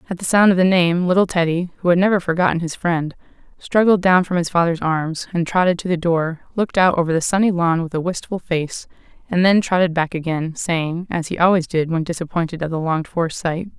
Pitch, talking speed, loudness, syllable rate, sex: 170 Hz, 225 wpm, -18 LUFS, 5.8 syllables/s, female